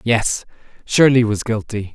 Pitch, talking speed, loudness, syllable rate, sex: 115 Hz, 125 wpm, -17 LUFS, 4.1 syllables/s, male